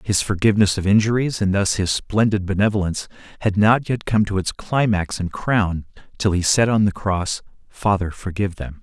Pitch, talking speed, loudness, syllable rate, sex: 100 Hz, 185 wpm, -20 LUFS, 5.2 syllables/s, male